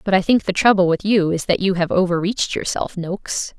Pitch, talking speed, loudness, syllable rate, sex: 185 Hz, 235 wpm, -18 LUFS, 5.8 syllables/s, female